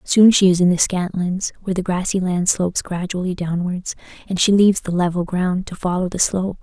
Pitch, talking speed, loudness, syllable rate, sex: 185 Hz, 210 wpm, -19 LUFS, 5.6 syllables/s, female